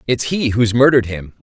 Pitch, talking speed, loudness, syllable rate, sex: 115 Hz, 205 wpm, -15 LUFS, 5.7 syllables/s, male